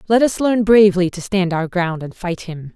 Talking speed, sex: 240 wpm, female